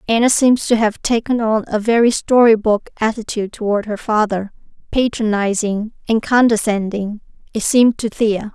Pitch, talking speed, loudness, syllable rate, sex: 220 Hz, 150 wpm, -16 LUFS, 5.2 syllables/s, female